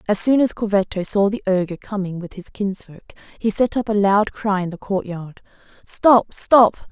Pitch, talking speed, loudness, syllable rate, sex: 200 Hz, 190 wpm, -19 LUFS, 4.7 syllables/s, female